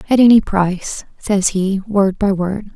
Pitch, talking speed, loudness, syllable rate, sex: 200 Hz, 175 wpm, -15 LUFS, 4.3 syllables/s, female